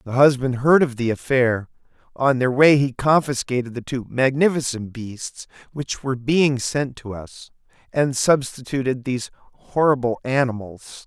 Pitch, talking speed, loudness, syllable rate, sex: 130 Hz, 140 wpm, -20 LUFS, 4.6 syllables/s, male